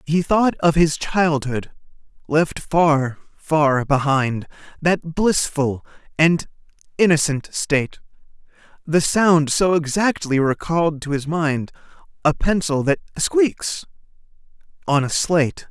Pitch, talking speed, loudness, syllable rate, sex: 155 Hz, 110 wpm, -19 LUFS, 3.7 syllables/s, male